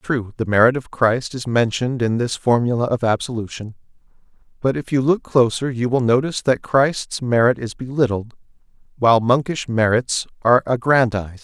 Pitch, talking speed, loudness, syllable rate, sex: 120 Hz, 155 wpm, -19 LUFS, 5.2 syllables/s, male